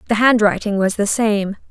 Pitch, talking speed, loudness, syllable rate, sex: 210 Hz, 175 wpm, -16 LUFS, 5.0 syllables/s, female